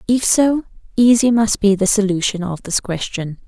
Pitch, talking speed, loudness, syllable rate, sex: 210 Hz, 175 wpm, -16 LUFS, 4.8 syllables/s, female